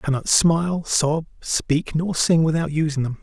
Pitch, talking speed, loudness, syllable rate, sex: 155 Hz, 205 wpm, -20 LUFS, 5.3 syllables/s, male